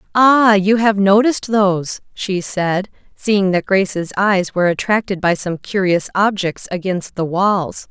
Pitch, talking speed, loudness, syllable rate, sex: 195 Hz, 150 wpm, -16 LUFS, 4.2 syllables/s, female